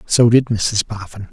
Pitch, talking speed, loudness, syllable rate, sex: 110 Hz, 180 wpm, -16 LUFS, 4.2 syllables/s, male